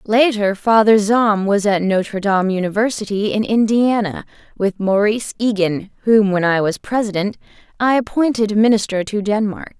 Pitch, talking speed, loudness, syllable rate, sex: 210 Hz, 140 wpm, -17 LUFS, 4.8 syllables/s, female